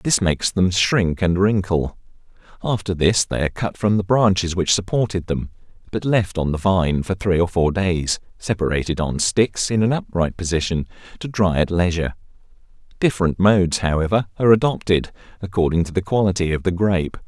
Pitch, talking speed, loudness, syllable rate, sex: 95 Hz, 175 wpm, -20 LUFS, 5.4 syllables/s, male